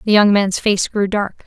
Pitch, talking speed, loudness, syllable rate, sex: 200 Hz, 245 wpm, -16 LUFS, 4.5 syllables/s, female